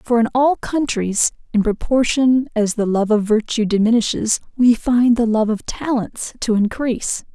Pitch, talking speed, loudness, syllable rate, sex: 230 Hz, 165 wpm, -18 LUFS, 4.5 syllables/s, female